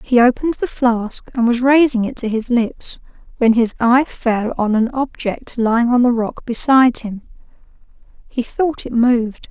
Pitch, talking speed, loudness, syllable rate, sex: 240 Hz, 175 wpm, -16 LUFS, 4.5 syllables/s, female